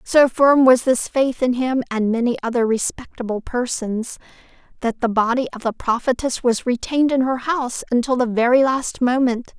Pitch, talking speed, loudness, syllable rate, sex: 250 Hz, 175 wpm, -19 LUFS, 5.0 syllables/s, female